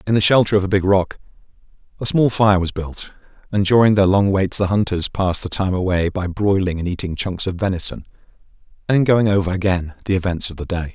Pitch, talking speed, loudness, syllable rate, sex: 95 Hz, 220 wpm, -18 LUFS, 6.0 syllables/s, male